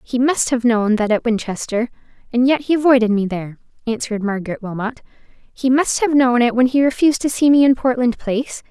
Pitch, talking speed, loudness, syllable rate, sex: 240 Hz, 205 wpm, -17 LUFS, 5.8 syllables/s, female